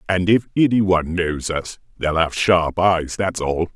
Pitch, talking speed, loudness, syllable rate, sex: 90 Hz, 190 wpm, -19 LUFS, 4.3 syllables/s, male